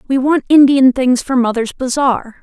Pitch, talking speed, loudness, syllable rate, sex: 260 Hz, 175 wpm, -13 LUFS, 4.5 syllables/s, female